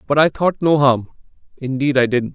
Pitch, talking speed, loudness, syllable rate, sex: 135 Hz, 205 wpm, -17 LUFS, 5.2 syllables/s, male